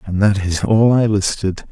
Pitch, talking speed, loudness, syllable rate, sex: 100 Hz, 210 wpm, -16 LUFS, 5.9 syllables/s, male